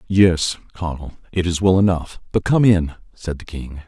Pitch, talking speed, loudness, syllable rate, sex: 85 Hz, 185 wpm, -19 LUFS, 4.6 syllables/s, male